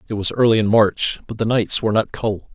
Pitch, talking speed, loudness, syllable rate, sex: 110 Hz, 260 wpm, -18 LUFS, 5.8 syllables/s, male